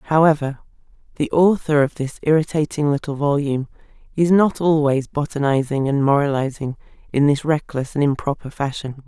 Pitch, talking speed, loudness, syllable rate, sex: 145 Hz, 130 wpm, -19 LUFS, 5.2 syllables/s, female